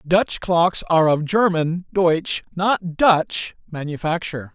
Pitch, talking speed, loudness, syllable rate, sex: 170 Hz, 120 wpm, -20 LUFS, 4.3 syllables/s, male